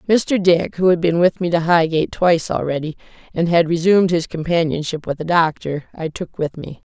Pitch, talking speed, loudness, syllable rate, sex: 165 Hz, 200 wpm, -18 LUFS, 5.5 syllables/s, female